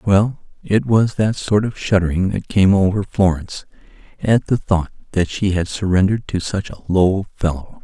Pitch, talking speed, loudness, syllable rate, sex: 95 Hz, 175 wpm, -18 LUFS, 4.8 syllables/s, male